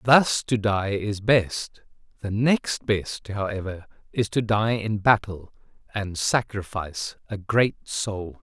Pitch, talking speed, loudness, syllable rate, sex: 105 Hz, 135 wpm, -24 LUFS, 3.5 syllables/s, male